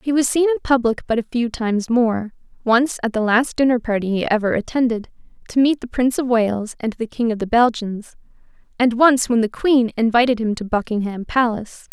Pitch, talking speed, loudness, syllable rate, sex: 235 Hz, 200 wpm, -19 LUFS, 5.4 syllables/s, female